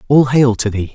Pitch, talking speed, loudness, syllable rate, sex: 125 Hz, 255 wpm, -14 LUFS, 5.2 syllables/s, male